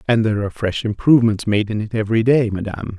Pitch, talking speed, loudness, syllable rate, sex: 110 Hz, 220 wpm, -18 LUFS, 7.1 syllables/s, male